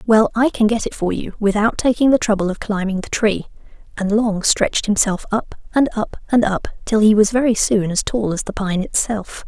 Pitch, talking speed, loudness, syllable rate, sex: 210 Hz, 220 wpm, -18 LUFS, 5.3 syllables/s, female